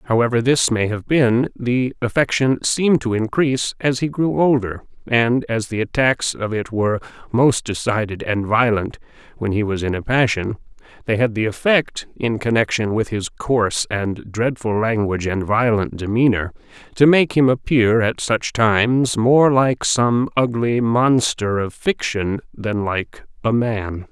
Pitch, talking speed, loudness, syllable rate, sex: 115 Hz, 160 wpm, -18 LUFS, 4.3 syllables/s, male